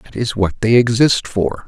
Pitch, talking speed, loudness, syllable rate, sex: 110 Hz, 215 wpm, -16 LUFS, 4.6 syllables/s, male